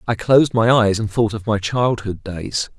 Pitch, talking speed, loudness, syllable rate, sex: 110 Hz, 215 wpm, -18 LUFS, 4.6 syllables/s, male